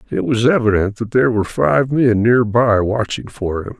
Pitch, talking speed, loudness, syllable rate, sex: 115 Hz, 205 wpm, -16 LUFS, 5.1 syllables/s, male